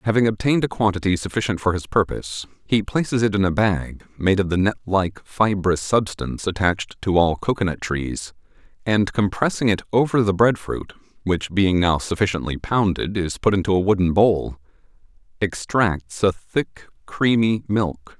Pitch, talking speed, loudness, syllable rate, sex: 100 Hz, 160 wpm, -21 LUFS, 5.0 syllables/s, male